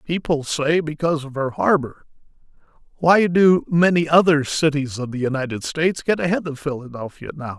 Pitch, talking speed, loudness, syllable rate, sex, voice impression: 150 Hz, 160 wpm, -19 LUFS, 5.3 syllables/s, male, masculine, old, powerful, slightly soft, slightly halting, raspy, mature, friendly, reassuring, wild, lively, slightly kind